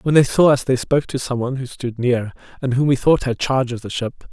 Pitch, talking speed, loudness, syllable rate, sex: 130 Hz, 290 wpm, -19 LUFS, 6.4 syllables/s, male